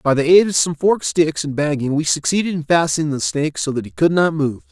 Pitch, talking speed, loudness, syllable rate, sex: 155 Hz, 265 wpm, -17 LUFS, 6.1 syllables/s, male